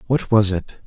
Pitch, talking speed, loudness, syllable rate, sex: 105 Hz, 205 wpm, -19 LUFS, 4.4 syllables/s, male